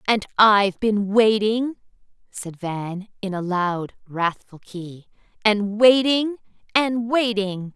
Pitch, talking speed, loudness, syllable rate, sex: 210 Hz, 110 wpm, -20 LUFS, 3.4 syllables/s, female